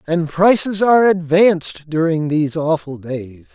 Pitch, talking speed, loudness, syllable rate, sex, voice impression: 165 Hz, 135 wpm, -16 LUFS, 4.5 syllables/s, male, masculine, middle-aged, slightly raspy, slightly refreshing, friendly, slightly reassuring